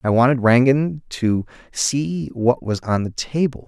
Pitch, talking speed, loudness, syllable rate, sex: 125 Hz, 165 wpm, -19 LUFS, 4.0 syllables/s, male